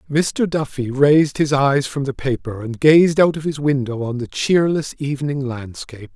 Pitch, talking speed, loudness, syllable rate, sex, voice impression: 140 Hz, 185 wpm, -18 LUFS, 4.8 syllables/s, male, masculine, slightly old, powerful, slightly hard, clear, raspy, mature, friendly, wild, lively, strict, slightly sharp